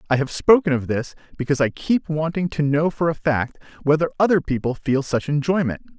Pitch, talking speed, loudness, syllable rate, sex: 150 Hz, 200 wpm, -21 LUFS, 5.7 syllables/s, male